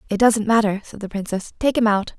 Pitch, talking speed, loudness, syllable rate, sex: 215 Hz, 245 wpm, -20 LUFS, 5.8 syllables/s, female